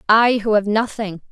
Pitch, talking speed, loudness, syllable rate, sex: 215 Hz, 180 wpm, -18 LUFS, 4.7 syllables/s, female